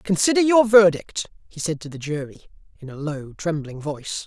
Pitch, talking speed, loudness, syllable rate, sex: 170 Hz, 185 wpm, -21 LUFS, 5.1 syllables/s, male